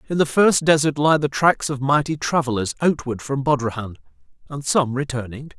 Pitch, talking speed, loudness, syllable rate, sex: 140 Hz, 170 wpm, -20 LUFS, 5.3 syllables/s, male